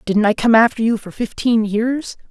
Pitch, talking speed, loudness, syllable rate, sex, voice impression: 225 Hz, 210 wpm, -17 LUFS, 4.8 syllables/s, female, very feminine, adult-like, slightly fluent, intellectual, elegant